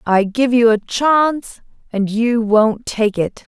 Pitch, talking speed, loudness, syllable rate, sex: 230 Hz, 170 wpm, -16 LUFS, 3.6 syllables/s, female